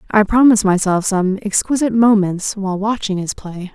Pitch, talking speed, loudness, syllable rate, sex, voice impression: 205 Hz, 160 wpm, -16 LUFS, 5.4 syllables/s, female, very feminine, slightly adult-like, soft, slightly cute, calm, reassuring, sweet, kind